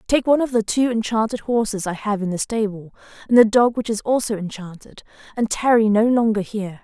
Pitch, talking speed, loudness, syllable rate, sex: 220 Hz, 210 wpm, -19 LUFS, 5.8 syllables/s, female